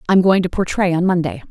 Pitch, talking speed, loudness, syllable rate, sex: 175 Hz, 280 wpm, -17 LUFS, 7.0 syllables/s, female